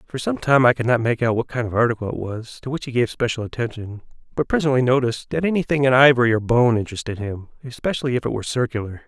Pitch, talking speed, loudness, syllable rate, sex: 120 Hz, 240 wpm, -20 LUFS, 6.9 syllables/s, male